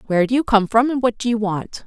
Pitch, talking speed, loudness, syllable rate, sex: 225 Hz, 320 wpm, -18 LUFS, 6.4 syllables/s, female